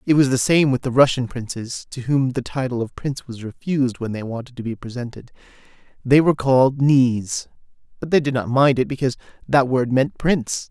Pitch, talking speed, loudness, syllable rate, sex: 130 Hz, 205 wpm, -20 LUFS, 5.7 syllables/s, male